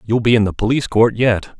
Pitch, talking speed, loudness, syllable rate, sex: 115 Hz, 265 wpm, -16 LUFS, 6.2 syllables/s, male